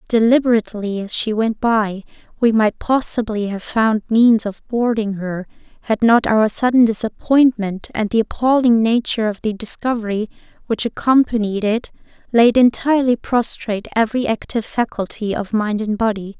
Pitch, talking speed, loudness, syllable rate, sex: 225 Hz, 145 wpm, -17 LUFS, 5.0 syllables/s, female